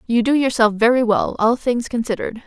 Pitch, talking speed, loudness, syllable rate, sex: 235 Hz, 195 wpm, -18 LUFS, 5.7 syllables/s, female